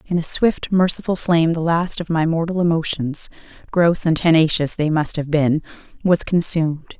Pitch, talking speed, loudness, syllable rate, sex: 165 Hz, 155 wpm, -18 LUFS, 5.1 syllables/s, female